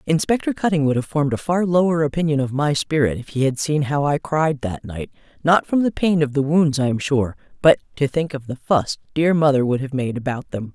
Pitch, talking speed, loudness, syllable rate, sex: 145 Hz, 245 wpm, -20 LUFS, 5.6 syllables/s, female